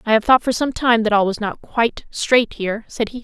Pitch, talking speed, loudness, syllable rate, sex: 225 Hz, 280 wpm, -18 LUFS, 5.6 syllables/s, female